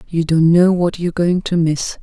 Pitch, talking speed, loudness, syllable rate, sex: 170 Hz, 240 wpm, -15 LUFS, 4.8 syllables/s, female